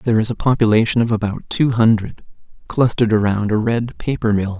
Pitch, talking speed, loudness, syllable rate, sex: 110 Hz, 185 wpm, -17 LUFS, 5.9 syllables/s, male